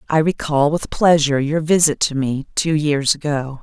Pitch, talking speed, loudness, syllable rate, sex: 150 Hz, 180 wpm, -17 LUFS, 4.7 syllables/s, female